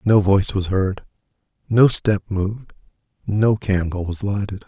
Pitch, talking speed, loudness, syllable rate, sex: 100 Hz, 140 wpm, -20 LUFS, 4.4 syllables/s, male